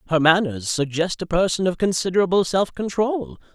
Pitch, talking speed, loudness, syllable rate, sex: 175 Hz, 150 wpm, -21 LUFS, 5.4 syllables/s, male